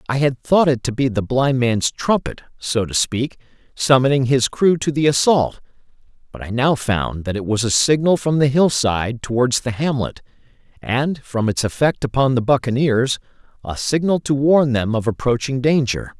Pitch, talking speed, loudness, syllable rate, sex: 130 Hz, 180 wpm, -18 LUFS, 4.8 syllables/s, male